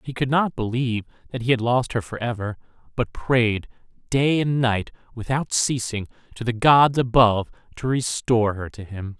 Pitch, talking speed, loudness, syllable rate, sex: 120 Hz, 175 wpm, -22 LUFS, 4.9 syllables/s, male